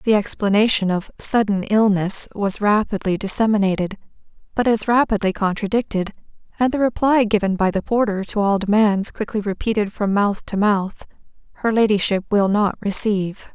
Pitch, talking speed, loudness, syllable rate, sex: 205 Hz, 145 wpm, -19 LUFS, 5.2 syllables/s, female